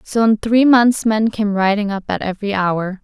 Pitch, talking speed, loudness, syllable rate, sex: 210 Hz, 220 wpm, -16 LUFS, 4.8 syllables/s, female